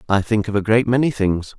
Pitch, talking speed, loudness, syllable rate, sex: 110 Hz, 265 wpm, -18 LUFS, 5.8 syllables/s, male